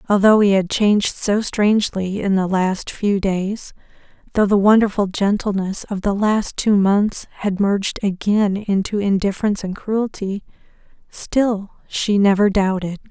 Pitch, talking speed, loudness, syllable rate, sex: 200 Hz, 140 wpm, -18 LUFS, 4.4 syllables/s, female